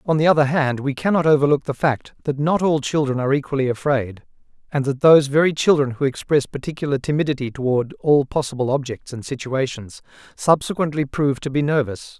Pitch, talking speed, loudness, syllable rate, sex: 140 Hz, 175 wpm, -20 LUFS, 5.9 syllables/s, male